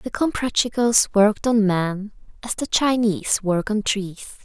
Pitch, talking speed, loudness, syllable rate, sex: 215 Hz, 150 wpm, -20 LUFS, 4.6 syllables/s, female